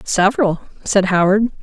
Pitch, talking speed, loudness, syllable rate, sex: 200 Hz, 110 wpm, -16 LUFS, 5.0 syllables/s, female